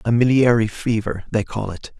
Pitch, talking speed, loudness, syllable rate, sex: 110 Hz, 180 wpm, -19 LUFS, 4.9 syllables/s, male